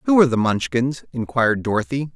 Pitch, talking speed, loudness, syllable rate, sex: 130 Hz, 165 wpm, -20 LUFS, 6.3 syllables/s, male